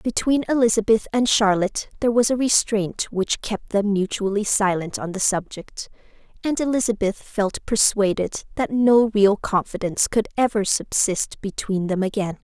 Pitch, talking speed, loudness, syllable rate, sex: 210 Hz, 145 wpm, -21 LUFS, 4.7 syllables/s, female